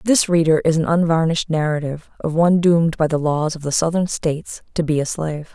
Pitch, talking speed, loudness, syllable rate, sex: 160 Hz, 215 wpm, -19 LUFS, 6.1 syllables/s, female